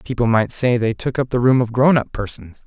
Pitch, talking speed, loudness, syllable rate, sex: 120 Hz, 270 wpm, -18 LUFS, 5.5 syllables/s, male